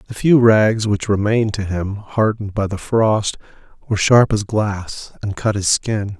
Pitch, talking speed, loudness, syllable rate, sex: 105 Hz, 185 wpm, -17 LUFS, 4.4 syllables/s, male